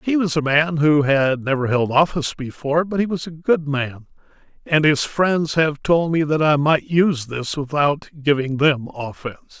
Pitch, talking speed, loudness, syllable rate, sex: 150 Hz, 195 wpm, -19 LUFS, 4.9 syllables/s, male